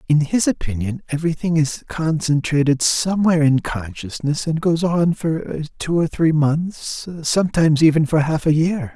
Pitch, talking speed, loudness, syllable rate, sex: 155 Hz, 155 wpm, -19 LUFS, 4.9 syllables/s, male